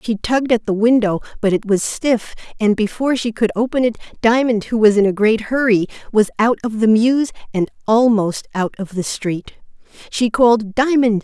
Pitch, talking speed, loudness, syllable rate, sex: 225 Hz, 190 wpm, -17 LUFS, 5.0 syllables/s, female